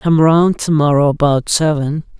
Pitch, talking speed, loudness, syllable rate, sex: 150 Hz, 165 wpm, -14 LUFS, 4.5 syllables/s, male